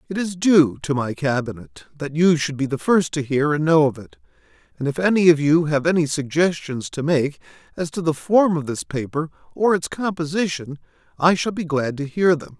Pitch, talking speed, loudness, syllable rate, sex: 155 Hz, 215 wpm, -20 LUFS, 5.2 syllables/s, male